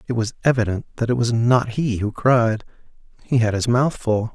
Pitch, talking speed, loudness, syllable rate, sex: 120 Hz, 205 wpm, -20 LUFS, 4.9 syllables/s, male